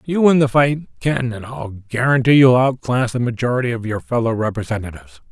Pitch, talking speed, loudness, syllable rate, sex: 120 Hz, 180 wpm, -17 LUFS, 5.5 syllables/s, male